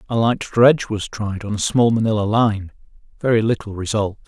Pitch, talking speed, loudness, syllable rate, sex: 110 Hz, 170 wpm, -19 LUFS, 5.4 syllables/s, male